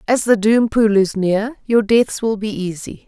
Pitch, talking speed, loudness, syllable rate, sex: 215 Hz, 215 wpm, -16 LUFS, 4.2 syllables/s, female